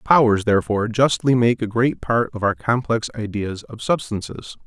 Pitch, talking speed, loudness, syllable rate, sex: 110 Hz, 165 wpm, -20 LUFS, 5.0 syllables/s, male